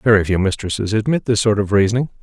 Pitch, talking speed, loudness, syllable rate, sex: 105 Hz, 215 wpm, -17 LUFS, 6.7 syllables/s, male